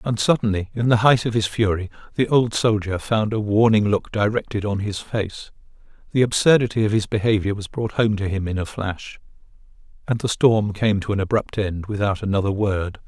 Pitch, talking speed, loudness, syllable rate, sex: 105 Hz, 195 wpm, -21 LUFS, 5.3 syllables/s, male